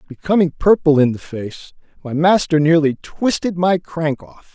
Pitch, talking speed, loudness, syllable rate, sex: 160 Hz, 160 wpm, -17 LUFS, 4.5 syllables/s, male